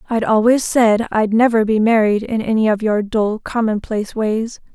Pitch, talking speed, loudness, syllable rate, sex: 220 Hz, 175 wpm, -16 LUFS, 4.8 syllables/s, female